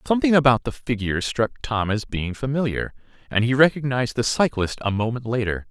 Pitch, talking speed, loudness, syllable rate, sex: 120 Hz, 180 wpm, -22 LUFS, 5.8 syllables/s, male